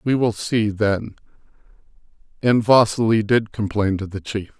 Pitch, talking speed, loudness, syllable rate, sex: 105 Hz, 145 wpm, -20 LUFS, 4.3 syllables/s, male